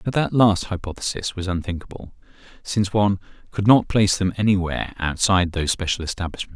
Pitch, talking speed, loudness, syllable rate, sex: 95 Hz, 155 wpm, -21 LUFS, 6.3 syllables/s, male